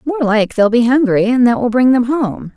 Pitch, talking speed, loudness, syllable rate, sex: 240 Hz, 260 wpm, -13 LUFS, 4.9 syllables/s, female